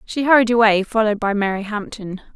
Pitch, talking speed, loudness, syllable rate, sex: 215 Hz, 180 wpm, -17 LUFS, 6.1 syllables/s, female